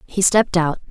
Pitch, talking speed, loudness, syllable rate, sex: 180 Hz, 200 wpm, -17 LUFS, 6.1 syllables/s, female